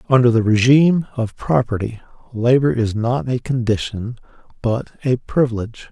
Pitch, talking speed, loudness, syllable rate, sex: 120 Hz, 130 wpm, -18 LUFS, 5.1 syllables/s, male